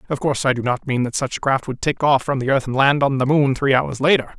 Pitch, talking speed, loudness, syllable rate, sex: 135 Hz, 330 wpm, -19 LUFS, 6.3 syllables/s, male